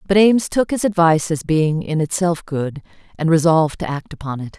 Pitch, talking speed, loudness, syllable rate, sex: 165 Hz, 210 wpm, -18 LUFS, 5.7 syllables/s, female